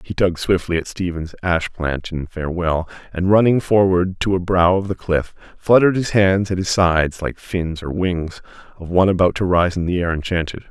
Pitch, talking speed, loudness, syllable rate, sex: 90 Hz, 205 wpm, -18 LUFS, 5.3 syllables/s, male